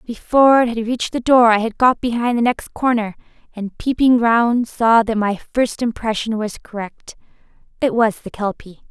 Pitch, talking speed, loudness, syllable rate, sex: 230 Hz, 180 wpm, -17 LUFS, 5.0 syllables/s, female